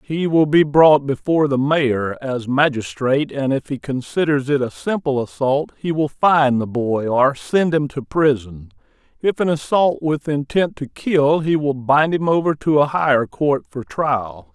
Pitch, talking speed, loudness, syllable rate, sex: 140 Hz, 185 wpm, -18 LUFS, 4.3 syllables/s, male